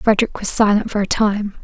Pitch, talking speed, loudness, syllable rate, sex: 210 Hz, 220 wpm, -17 LUFS, 5.8 syllables/s, female